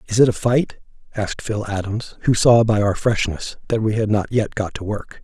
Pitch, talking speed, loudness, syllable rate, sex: 110 Hz, 230 wpm, -20 LUFS, 5.1 syllables/s, male